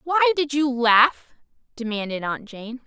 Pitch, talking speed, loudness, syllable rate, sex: 250 Hz, 145 wpm, -21 LUFS, 3.9 syllables/s, female